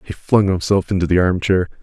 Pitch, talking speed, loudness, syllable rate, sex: 90 Hz, 195 wpm, -17 LUFS, 5.6 syllables/s, male